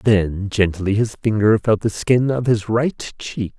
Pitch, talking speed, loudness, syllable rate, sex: 110 Hz, 185 wpm, -19 LUFS, 3.8 syllables/s, male